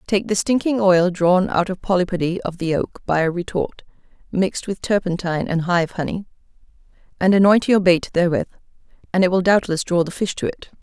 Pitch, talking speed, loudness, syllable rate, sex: 185 Hz, 190 wpm, -19 LUFS, 5.7 syllables/s, female